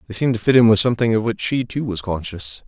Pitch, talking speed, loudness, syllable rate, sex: 110 Hz, 290 wpm, -18 LUFS, 6.9 syllables/s, male